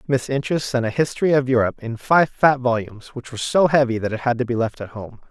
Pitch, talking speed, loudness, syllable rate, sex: 125 Hz, 260 wpm, -20 LUFS, 6.1 syllables/s, male